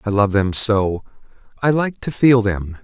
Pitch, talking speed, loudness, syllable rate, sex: 110 Hz, 190 wpm, -17 LUFS, 4.2 syllables/s, male